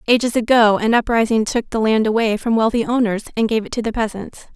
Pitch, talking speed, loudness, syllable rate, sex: 225 Hz, 225 wpm, -17 LUFS, 5.9 syllables/s, female